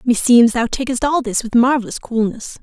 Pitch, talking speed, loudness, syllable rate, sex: 240 Hz, 185 wpm, -16 LUFS, 5.2 syllables/s, female